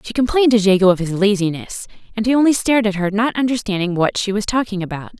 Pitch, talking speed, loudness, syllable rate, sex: 210 Hz, 230 wpm, -17 LUFS, 6.7 syllables/s, female